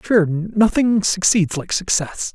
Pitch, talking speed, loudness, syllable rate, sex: 195 Hz, 130 wpm, -18 LUFS, 3.6 syllables/s, male